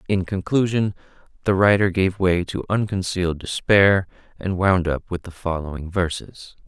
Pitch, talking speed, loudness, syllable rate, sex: 95 Hz, 145 wpm, -21 LUFS, 4.7 syllables/s, male